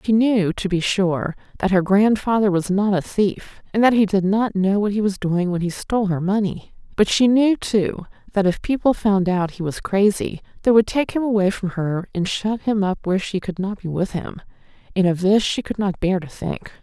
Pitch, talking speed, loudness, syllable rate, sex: 200 Hz, 235 wpm, -20 LUFS, 5.0 syllables/s, female